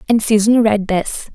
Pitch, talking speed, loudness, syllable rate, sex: 215 Hz, 180 wpm, -15 LUFS, 4.3 syllables/s, female